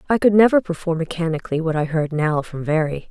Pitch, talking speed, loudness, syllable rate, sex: 165 Hz, 215 wpm, -20 LUFS, 6.2 syllables/s, female